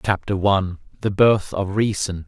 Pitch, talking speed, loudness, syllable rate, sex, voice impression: 95 Hz, 130 wpm, -20 LUFS, 4.6 syllables/s, male, very masculine, very adult-like, very middle-aged, very thick, slightly tensed, powerful, slightly bright, slightly hard, slightly muffled, slightly fluent, cool, intellectual, sincere, very calm, mature, very friendly, reassuring, slightly unique, wild, sweet, slightly lively, kind, slightly modest